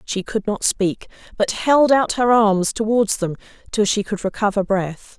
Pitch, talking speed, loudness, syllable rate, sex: 210 Hz, 185 wpm, -19 LUFS, 4.3 syllables/s, female